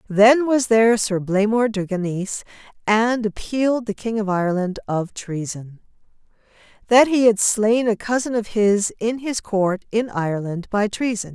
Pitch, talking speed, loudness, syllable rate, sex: 215 Hz, 160 wpm, -20 LUFS, 4.6 syllables/s, female